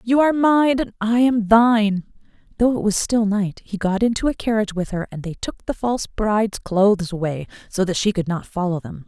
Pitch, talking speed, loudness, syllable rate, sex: 210 Hz, 225 wpm, -20 LUFS, 5.5 syllables/s, female